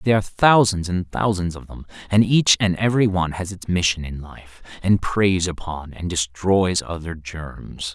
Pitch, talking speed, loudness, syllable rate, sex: 90 Hz, 180 wpm, -20 LUFS, 4.7 syllables/s, male